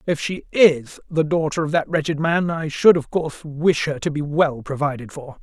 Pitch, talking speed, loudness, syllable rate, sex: 155 Hz, 220 wpm, -20 LUFS, 5.0 syllables/s, male